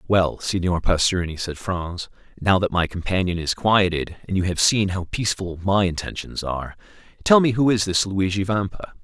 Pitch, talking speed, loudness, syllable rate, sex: 95 Hz, 180 wpm, -22 LUFS, 5.1 syllables/s, male